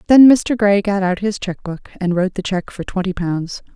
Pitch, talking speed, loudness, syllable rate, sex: 200 Hz, 240 wpm, -17 LUFS, 5.0 syllables/s, female